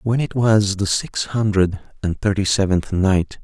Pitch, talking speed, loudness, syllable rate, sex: 100 Hz, 175 wpm, -19 LUFS, 4.1 syllables/s, male